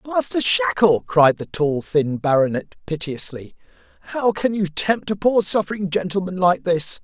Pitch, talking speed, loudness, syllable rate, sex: 170 Hz, 155 wpm, -20 LUFS, 4.5 syllables/s, male